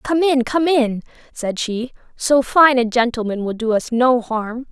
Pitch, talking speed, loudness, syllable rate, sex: 245 Hz, 190 wpm, -18 LUFS, 4.1 syllables/s, female